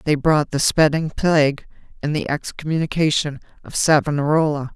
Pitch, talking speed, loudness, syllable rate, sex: 150 Hz, 125 wpm, -19 LUFS, 5.3 syllables/s, female